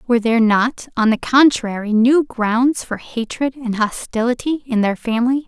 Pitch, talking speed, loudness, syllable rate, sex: 240 Hz, 165 wpm, -17 LUFS, 4.8 syllables/s, female